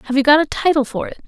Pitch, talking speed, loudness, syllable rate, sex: 280 Hz, 330 wpm, -16 LUFS, 7.9 syllables/s, female